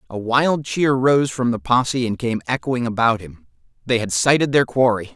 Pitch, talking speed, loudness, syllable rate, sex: 120 Hz, 200 wpm, -19 LUFS, 4.9 syllables/s, male